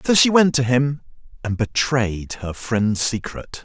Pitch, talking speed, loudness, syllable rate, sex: 130 Hz, 165 wpm, -20 LUFS, 3.9 syllables/s, male